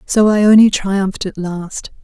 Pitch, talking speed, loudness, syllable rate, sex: 200 Hz, 150 wpm, -14 LUFS, 3.2 syllables/s, female